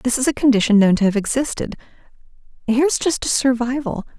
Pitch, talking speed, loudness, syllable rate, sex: 245 Hz, 160 wpm, -18 LUFS, 6.0 syllables/s, female